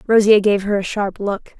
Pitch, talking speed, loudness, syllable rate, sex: 205 Hz, 225 wpm, -17 LUFS, 4.8 syllables/s, female